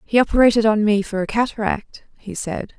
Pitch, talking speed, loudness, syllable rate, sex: 215 Hz, 195 wpm, -19 LUFS, 5.5 syllables/s, female